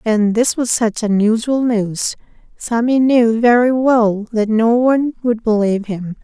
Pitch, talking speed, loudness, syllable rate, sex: 230 Hz, 155 wpm, -15 LUFS, 4.1 syllables/s, female